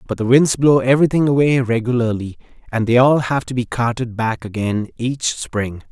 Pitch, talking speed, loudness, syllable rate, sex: 125 Hz, 185 wpm, -17 LUFS, 5.1 syllables/s, male